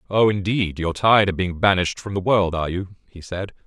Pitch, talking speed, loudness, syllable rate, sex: 95 Hz, 230 wpm, -20 LUFS, 6.3 syllables/s, male